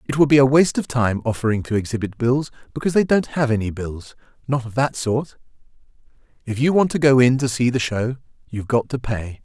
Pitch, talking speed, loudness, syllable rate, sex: 125 Hz, 215 wpm, -20 LUFS, 5.9 syllables/s, male